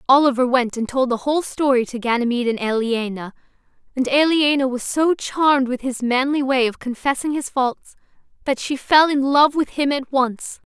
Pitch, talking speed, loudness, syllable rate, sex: 265 Hz, 185 wpm, -19 LUFS, 5.4 syllables/s, female